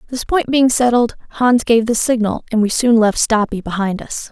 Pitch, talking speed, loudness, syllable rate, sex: 230 Hz, 210 wpm, -15 LUFS, 5.1 syllables/s, female